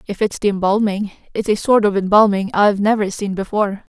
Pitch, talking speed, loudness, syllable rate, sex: 205 Hz, 200 wpm, -17 LUFS, 6.0 syllables/s, female